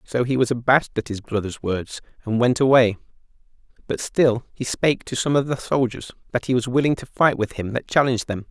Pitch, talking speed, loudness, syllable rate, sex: 125 Hz, 220 wpm, -21 LUFS, 5.8 syllables/s, male